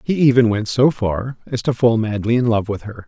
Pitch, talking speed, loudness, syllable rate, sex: 115 Hz, 255 wpm, -18 LUFS, 5.2 syllables/s, male